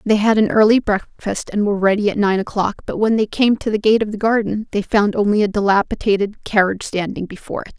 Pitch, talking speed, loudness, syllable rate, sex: 210 Hz, 230 wpm, -17 LUFS, 6.1 syllables/s, female